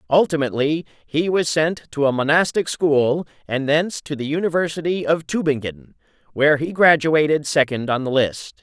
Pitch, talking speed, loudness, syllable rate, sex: 150 Hz, 155 wpm, -19 LUFS, 5.1 syllables/s, male